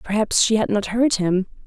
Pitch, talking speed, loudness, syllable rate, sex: 210 Hz, 215 wpm, -19 LUFS, 5.0 syllables/s, female